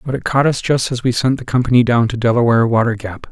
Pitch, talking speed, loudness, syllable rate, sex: 120 Hz, 270 wpm, -15 LUFS, 6.6 syllables/s, male